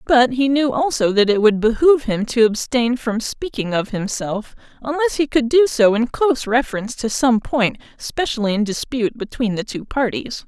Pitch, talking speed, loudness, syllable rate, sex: 240 Hz, 190 wpm, -18 LUFS, 5.1 syllables/s, female